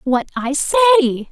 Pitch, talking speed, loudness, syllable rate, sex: 310 Hz, 135 wpm, -15 LUFS, 5.0 syllables/s, female